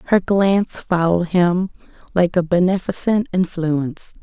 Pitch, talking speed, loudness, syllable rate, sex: 180 Hz, 115 wpm, -18 LUFS, 4.6 syllables/s, female